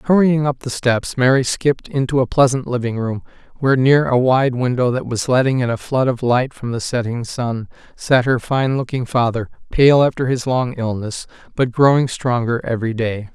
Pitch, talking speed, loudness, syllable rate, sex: 125 Hz, 195 wpm, -18 LUFS, 5.0 syllables/s, male